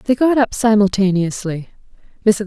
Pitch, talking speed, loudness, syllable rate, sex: 210 Hz, 95 wpm, -16 LUFS, 4.6 syllables/s, female